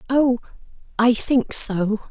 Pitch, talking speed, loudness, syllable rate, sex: 235 Hz, 115 wpm, -19 LUFS, 3.2 syllables/s, female